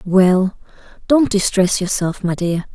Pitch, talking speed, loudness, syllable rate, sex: 190 Hz, 130 wpm, -17 LUFS, 3.7 syllables/s, female